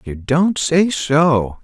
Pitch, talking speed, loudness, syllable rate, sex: 145 Hz, 145 wpm, -16 LUFS, 2.6 syllables/s, male